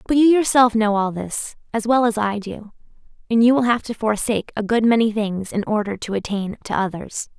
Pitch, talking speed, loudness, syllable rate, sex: 220 Hz, 220 wpm, -20 LUFS, 5.3 syllables/s, female